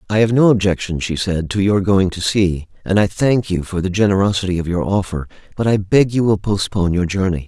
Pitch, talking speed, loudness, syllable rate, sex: 95 Hz, 235 wpm, -17 LUFS, 5.7 syllables/s, male